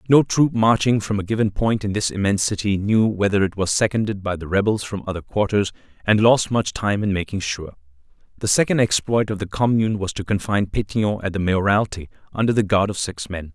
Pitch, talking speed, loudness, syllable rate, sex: 105 Hz, 215 wpm, -20 LUFS, 5.8 syllables/s, male